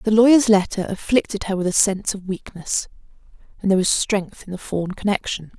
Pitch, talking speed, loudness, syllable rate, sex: 195 Hz, 195 wpm, -20 LUFS, 5.7 syllables/s, female